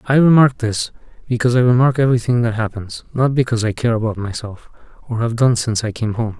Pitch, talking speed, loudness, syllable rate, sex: 120 Hz, 205 wpm, -17 LUFS, 6.4 syllables/s, male